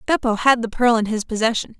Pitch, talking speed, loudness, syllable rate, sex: 230 Hz, 235 wpm, -19 LUFS, 6.1 syllables/s, female